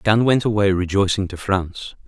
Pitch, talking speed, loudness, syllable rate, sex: 100 Hz, 175 wpm, -19 LUFS, 5.3 syllables/s, male